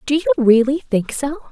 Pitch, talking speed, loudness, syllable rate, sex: 265 Hz, 200 wpm, -17 LUFS, 5.2 syllables/s, female